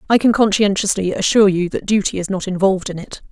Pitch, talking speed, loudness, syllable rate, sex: 195 Hz, 215 wpm, -16 LUFS, 6.5 syllables/s, female